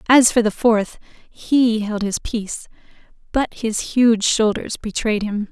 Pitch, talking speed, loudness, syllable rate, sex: 220 Hz, 150 wpm, -19 LUFS, 3.9 syllables/s, female